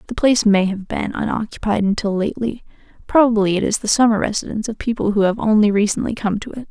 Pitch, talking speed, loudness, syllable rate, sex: 215 Hz, 195 wpm, -18 LUFS, 6.6 syllables/s, female